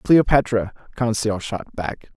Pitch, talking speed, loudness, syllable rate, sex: 110 Hz, 110 wpm, -21 LUFS, 4.1 syllables/s, male